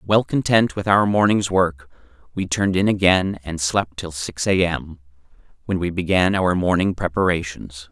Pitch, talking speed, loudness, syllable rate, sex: 90 Hz, 165 wpm, -20 LUFS, 4.6 syllables/s, male